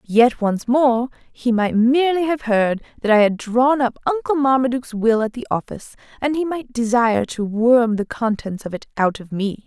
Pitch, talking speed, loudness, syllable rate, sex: 240 Hz, 200 wpm, -19 LUFS, 5.0 syllables/s, female